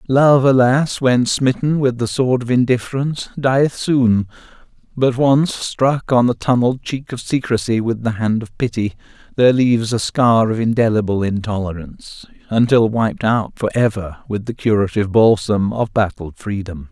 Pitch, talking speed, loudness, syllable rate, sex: 115 Hz, 155 wpm, -17 LUFS, 4.7 syllables/s, male